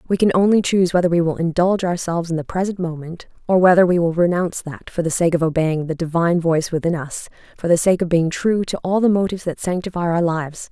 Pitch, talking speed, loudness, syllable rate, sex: 175 Hz, 235 wpm, -19 LUFS, 6.5 syllables/s, female